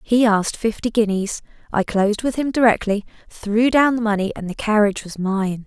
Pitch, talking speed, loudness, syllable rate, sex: 215 Hz, 190 wpm, -19 LUFS, 5.4 syllables/s, female